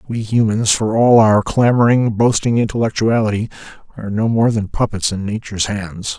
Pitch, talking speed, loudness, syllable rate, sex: 110 Hz, 155 wpm, -16 LUFS, 5.2 syllables/s, male